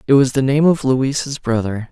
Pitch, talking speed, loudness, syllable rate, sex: 130 Hz, 220 wpm, -16 LUFS, 5.1 syllables/s, male